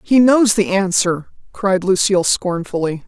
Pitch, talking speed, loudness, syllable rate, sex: 190 Hz, 135 wpm, -16 LUFS, 4.4 syllables/s, female